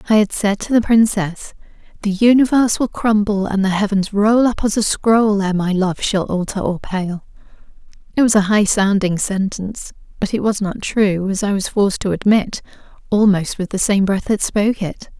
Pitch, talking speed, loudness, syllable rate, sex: 205 Hz, 195 wpm, -17 LUFS, 5.0 syllables/s, female